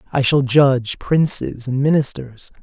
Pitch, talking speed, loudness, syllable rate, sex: 135 Hz, 135 wpm, -17 LUFS, 4.4 syllables/s, male